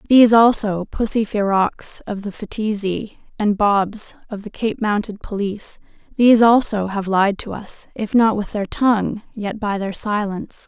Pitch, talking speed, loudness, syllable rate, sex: 210 Hz, 165 wpm, -19 LUFS, 4.6 syllables/s, female